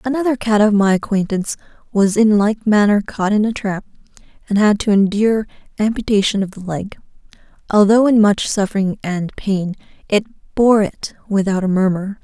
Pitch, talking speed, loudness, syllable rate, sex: 205 Hz, 160 wpm, -16 LUFS, 5.3 syllables/s, female